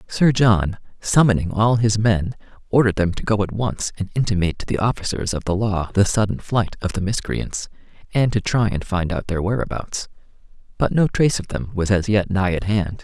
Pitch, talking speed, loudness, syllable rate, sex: 105 Hz, 205 wpm, -20 LUFS, 5.4 syllables/s, male